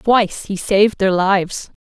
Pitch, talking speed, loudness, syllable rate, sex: 200 Hz, 165 wpm, -16 LUFS, 4.7 syllables/s, female